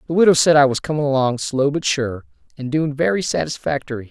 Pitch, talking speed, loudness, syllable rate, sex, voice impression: 140 Hz, 205 wpm, -18 LUFS, 6.1 syllables/s, male, masculine, adult-like, tensed, powerful, clear, fluent, cool, intellectual, friendly, slightly wild, lively, slightly light